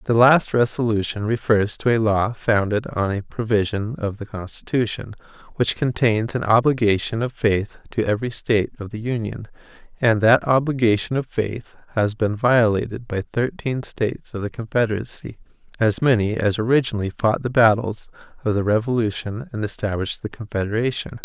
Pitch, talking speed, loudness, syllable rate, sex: 110 Hz, 150 wpm, -21 LUFS, 5.2 syllables/s, male